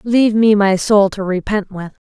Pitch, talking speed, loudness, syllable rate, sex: 205 Hz, 205 wpm, -14 LUFS, 4.8 syllables/s, female